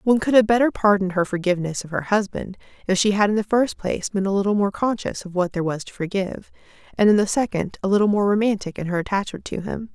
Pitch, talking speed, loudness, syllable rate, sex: 200 Hz, 245 wpm, -21 LUFS, 6.7 syllables/s, female